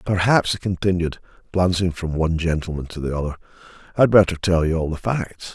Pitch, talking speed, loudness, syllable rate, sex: 90 Hz, 195 wpm, -21 LUFS, 6.0 syllables/s, male